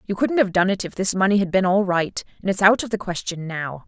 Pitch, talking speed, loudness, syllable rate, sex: 190 Hz, 295 wpm, -21 LUFS, 5.8 syllables/s, female